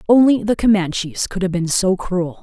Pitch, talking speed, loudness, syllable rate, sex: 195 Hz, 200 wpm, -17 LUFS, 4.9 syllables/s, female